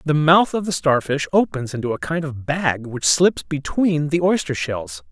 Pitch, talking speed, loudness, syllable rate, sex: 150 Hz, 200 wpm, -20 LUFS, 4.5 syllables/s, male